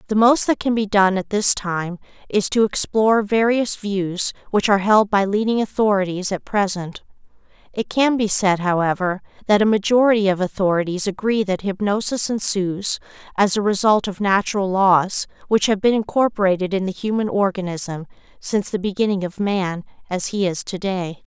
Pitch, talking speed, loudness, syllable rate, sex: 200 Hz, 165 wpm, -19 LUFS, 5.1 syllables/s, female